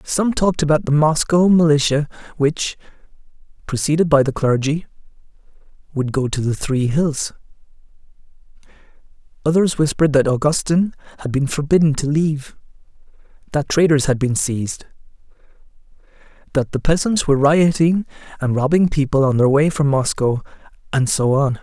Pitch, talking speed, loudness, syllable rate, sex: 145 Hz, 130 wpm, -18 LUFS, 5.3 syllables/s, male